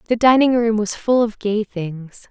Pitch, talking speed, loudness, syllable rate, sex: 215 Hz, 210 wpm, -18 LUFS, 4.3 syllables/s, female